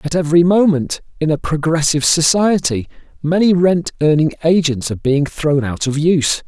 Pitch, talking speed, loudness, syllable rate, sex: 155 Hz, 160 wpm, -15 LUFS, 5.3 syllables/s, male